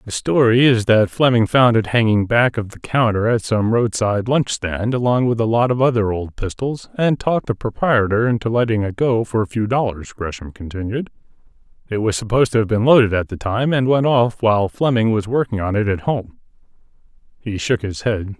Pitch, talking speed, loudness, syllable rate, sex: 115 Hz, 210 wpm, -18 LUFS, 5.4 syllables/s, male